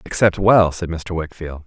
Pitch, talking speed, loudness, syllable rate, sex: 85 Hz, 180 wpm, -18 LUFS, 4.5 syllables/s, male